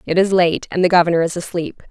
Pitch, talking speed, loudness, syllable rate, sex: 175 Hz, 250 wpm, -17 LUFS, 6.4 syllables/s, female